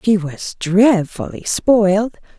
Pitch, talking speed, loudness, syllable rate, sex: 200 Hz, 100 wpm, -16 LUFS, 3.5 syllables/s, female